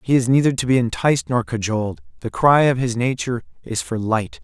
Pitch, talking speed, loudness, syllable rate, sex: 120 Hz, 215 wpm, -19 LUFS, 5.9 syllables/s, male